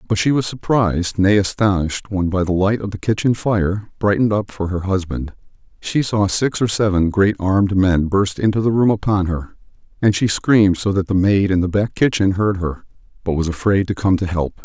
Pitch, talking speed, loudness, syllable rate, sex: 100 Hz, 215 wpm, -18 LUFS, 4.9 syllables/s, male